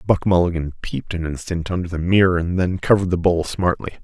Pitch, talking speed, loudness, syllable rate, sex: 90 Hz, 210 wpm, -20 LUFS, 6.2 syllables/s, male